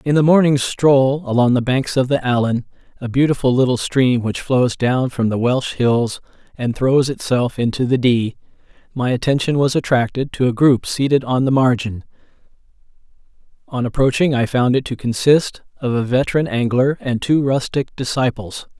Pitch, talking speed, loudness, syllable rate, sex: 130 Hz, 170 wpm, -17 LUFS, 4.9 syllables/s, male